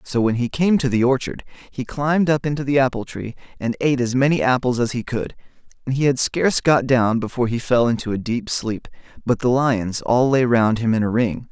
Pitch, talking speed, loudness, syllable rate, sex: 125 Hz, 235 wpm, -19 LUFS, 5.5 syllables/s, male